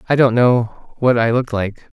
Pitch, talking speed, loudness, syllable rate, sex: 120 Hz, 210 wpm, -16 LUFS, 4.8 syllables/s, male